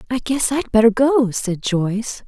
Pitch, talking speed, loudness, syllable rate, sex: 230 Hz, 185 wpm, -18 LUFS, 4.4 syllables/s, female